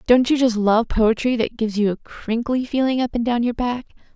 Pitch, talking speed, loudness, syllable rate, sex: 235 Hz, 230 wpm, -20 LUFS, 5.4 syllables/s, female